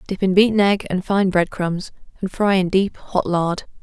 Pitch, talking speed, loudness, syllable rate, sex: 190 Hz, 220 wpm, -19 LUFS, 4.6 syllables/s, female